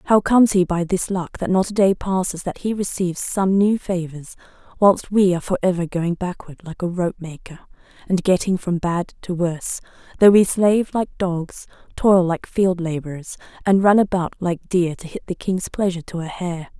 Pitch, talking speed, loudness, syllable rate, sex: 180 Hz, 200 wpm, -20 LUFS, 5.1 syllables/s, female